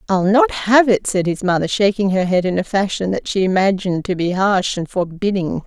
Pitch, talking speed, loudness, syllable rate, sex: 195 Hz, 220 wpm, -17 LUFS, 5.3 syllables/s, female